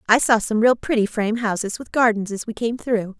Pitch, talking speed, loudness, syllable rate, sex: 225 Hz, 245 wpm, -20 LUFS, 5.7 syllables/s, female